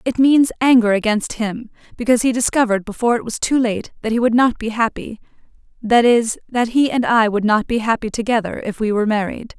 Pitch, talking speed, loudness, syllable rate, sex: 230 Hz, 205 wpm, -17 LUFS, 5.9 syllables/s, female